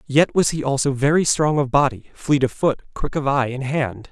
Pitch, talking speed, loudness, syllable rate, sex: 140 Hz, 235 wpm, -20 LUFS, 5.1 syllables/s, male